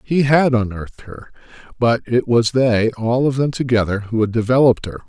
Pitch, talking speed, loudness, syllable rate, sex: 120 Hz, 190 wpm, -17 LUFS, 5.1 syllables/s, male